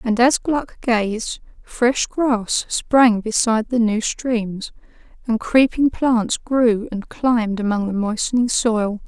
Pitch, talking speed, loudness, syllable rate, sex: 230 Hz, 140 wpm, -19 LUFS, 3.5 syllables/s, female